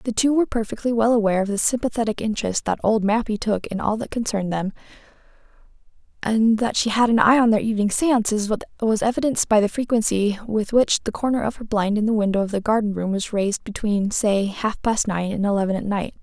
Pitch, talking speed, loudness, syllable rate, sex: 215 Hz, 220 wpm, -21 LUFS, 6.1 syllables/s, female